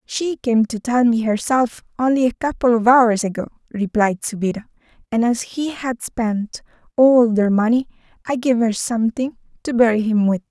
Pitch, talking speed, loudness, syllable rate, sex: 235 Hz, 170 wpm, -18 LUFS, 4.8 syllables/s, female